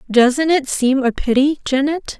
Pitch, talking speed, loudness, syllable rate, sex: 275 Hz, 165 wpm, -16 LUFS, 4.1 syllables/s, female